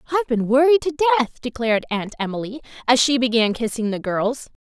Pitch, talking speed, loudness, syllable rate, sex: 250 Hz, 180 wpm, -20 LUFS, 6.0 syllables/s, female